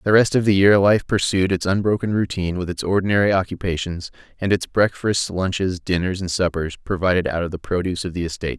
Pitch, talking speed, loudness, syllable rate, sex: 95 Hz, 205 wpm, -20 LUFS, 6.1 syllables/s, male